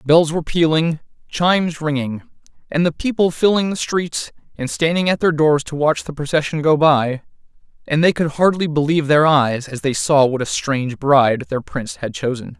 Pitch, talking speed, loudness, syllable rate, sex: 150 Hz, 190 wpm, -18 LUFS, 5.1 syllables/s, male